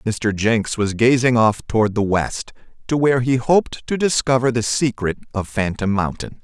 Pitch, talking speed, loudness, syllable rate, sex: 115 Hz, 170 wpm, -19 LUFS, 4.8 syllables/s, male